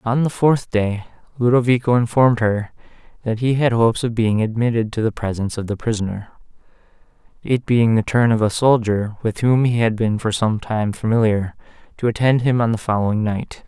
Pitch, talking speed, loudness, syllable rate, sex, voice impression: 115 Hz, 190 wpm, -19 LUFS, 5.5 syllables/s, male, masculine, adult-like, slightly dark, slightly sincere, slightly calm